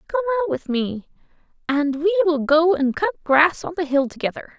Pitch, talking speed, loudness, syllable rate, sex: 275 Hz, 195 wpm, -20 LUFS, 5.3 syllables/s, female